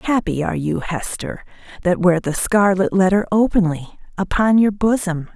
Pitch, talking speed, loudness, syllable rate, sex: 190 Hz, 145 wpm, -18 LUFS, 4.9 syllables/s, female